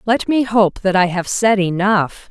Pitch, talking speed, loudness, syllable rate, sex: 200 Hz, 210 wpm, -16 LUFS, 4.1 syllables/s, female